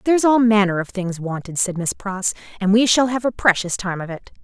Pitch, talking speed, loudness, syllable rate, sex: 205 Hz, 245 wpm, -19 LUFS, 5.6 syllables/s, female